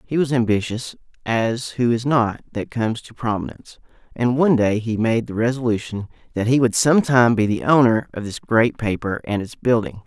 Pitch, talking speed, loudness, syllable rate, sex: 115 Hz, 190 wpm, -20 LUFS, 5.5 syllables/s, male